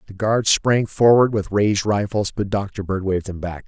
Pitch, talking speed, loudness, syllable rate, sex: 100 Hz, 210 wpm, -19 LUFS, 4.9 syllables/s, male